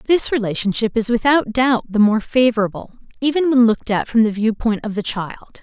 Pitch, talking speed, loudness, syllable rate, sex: 230 Hz, 190 wpm, -17 LUFS, 5.6 syllables/s, female